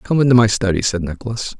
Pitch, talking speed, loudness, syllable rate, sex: 110 Hz, 225 wpm, -17 LUFS, 6.8 syllables/s, male